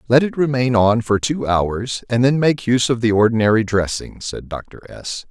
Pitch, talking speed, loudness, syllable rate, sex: 120 Hz, 205 wpm, -18 LUFS, 4.8 syllables/s, male